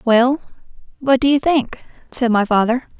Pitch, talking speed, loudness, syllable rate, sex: 250 Hz, 160 wpm, -17 LUFS, 4.6 syllables/s, female